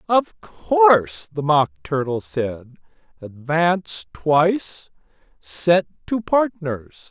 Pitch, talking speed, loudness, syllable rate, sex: 160 Hz, 95 wpm, -20 LUFS, 3.0 syllables/s, male